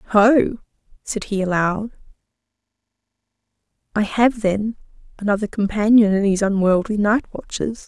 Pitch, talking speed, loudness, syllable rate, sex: 210 Hz, 100 wpm, -19 LUFS, 4.7 syllables/s, female